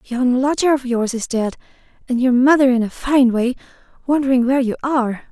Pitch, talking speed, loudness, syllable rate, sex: 255 Hz, 190 wpm, -17 LUFS, 5.7 syllables/s, female